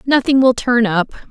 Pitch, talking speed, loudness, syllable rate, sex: 240 Hz, 185 wpm, -14 LUFS, 4.3 syllables/s, female